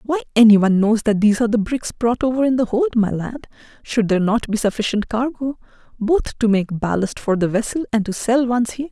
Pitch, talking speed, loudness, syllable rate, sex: 230 Hz, 220 wpm, -18 LUFS, 5.8 syllables/s, female